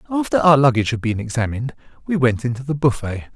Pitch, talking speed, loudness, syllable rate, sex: 130 Hz, 195 wpm, -19 LUFS, 7.0 syllables/s, male